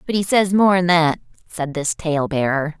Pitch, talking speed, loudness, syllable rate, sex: 165 Hz, 195 wpm, -18 LUFS, 4.7 syllables/s, female